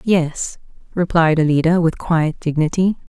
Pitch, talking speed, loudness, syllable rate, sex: 165 Hz, 115 wpm, -18 LUFS, 4.3 syllables/s, female